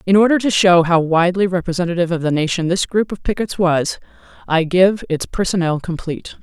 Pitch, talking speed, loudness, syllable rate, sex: 175 Hz, 185 wpm, -17 LUFS, 5.9 syllables/s, female